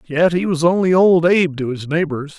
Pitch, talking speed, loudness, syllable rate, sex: 165 Hz, 225 wpm, -16 LUFS, 5.4 syllables/s, male